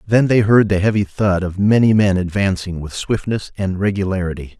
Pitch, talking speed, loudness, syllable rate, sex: 100 Hz, 185 wpm, -17 LUFS, 5.2 syllables/s, male